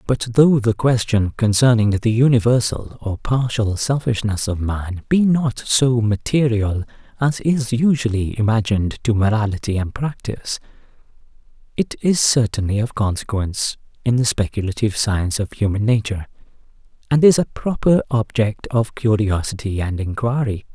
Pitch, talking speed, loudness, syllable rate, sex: 115 Hz, 130 wpm, -19 LUFS, 4.9 syllables/s, male